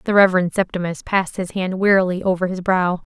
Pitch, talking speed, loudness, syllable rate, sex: 185 Hz, 195 wpm, -19 LUFS, 6.2 syllables/s, female